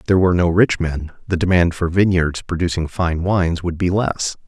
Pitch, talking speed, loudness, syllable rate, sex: 85 Hz, 215 wpm, -18 LUFS, 5.5 syllables/s, male